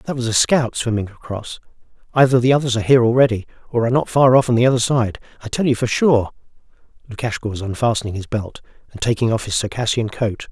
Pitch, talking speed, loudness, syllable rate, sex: 120 Hz, 205 wpm, -18 LUFS, 6.6 syllables/s, male